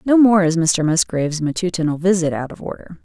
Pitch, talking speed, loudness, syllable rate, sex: 175 Hz, 195 wpm, -17 LUFS, 5.8 syllables/s, female